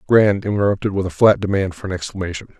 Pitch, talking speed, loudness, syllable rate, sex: 95 Hz, 210 wpm, -18 LUFS, 7.2 syllables/s, male